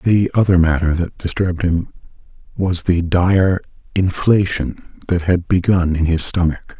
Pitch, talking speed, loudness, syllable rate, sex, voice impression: 90 Hz, 140 wpm, -17 LUFS, 4.4 syllables/s, male, masculine, middle-aged, soft, fluent, raspy, sincere, calm, mature, friendly, reassuring, wild, kind